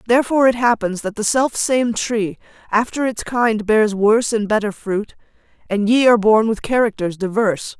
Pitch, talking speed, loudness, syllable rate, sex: 220 Hz, 170 wpm, -17 LUFS, 5.3 syllables/s, female